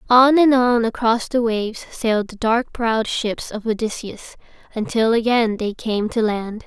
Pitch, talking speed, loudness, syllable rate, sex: 225 Hz, 170 wpm, -19 LUFS, 4.4 syllables/s, female